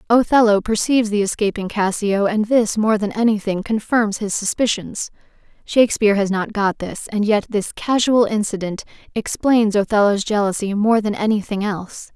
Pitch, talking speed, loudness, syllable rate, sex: 210 Hz, 150 wpm, -18 LUFS, 5.1 syllables/s, female